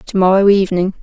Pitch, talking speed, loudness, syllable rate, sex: 190 Hz, 175 wpm, -13 LUFS, 6.8 syllables/s, female